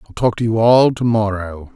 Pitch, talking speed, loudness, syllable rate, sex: 110 Hz, 240 wpm, -16 LUFS, 5.0 syllables/s, male